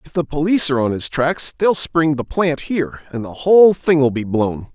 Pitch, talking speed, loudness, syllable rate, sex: 145 Hz, 230 wpm, -17 LUFS, 5.2 syllables/s, male